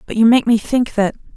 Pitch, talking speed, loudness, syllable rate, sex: 225 Hz, 265 wpm, -15 LUFS, 5.9 syllables/s, female